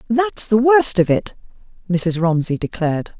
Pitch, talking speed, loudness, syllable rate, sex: 205 Hz, 150 wpm, -18 LUFS, 4.5 syllables/s, female